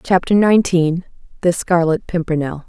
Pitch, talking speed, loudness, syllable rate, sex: 175 Hz, 110 wpm, -16 LUFS, 5.1 syllables/s, female